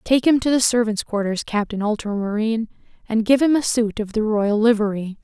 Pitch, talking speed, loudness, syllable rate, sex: 220 Hz, 195 wpm, -20 LUFS, 5.6 syllables/s, female